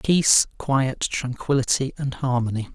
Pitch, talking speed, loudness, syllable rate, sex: 130 Hz, 110 wpm, -22 LUFS, 4.4 syllables/s, male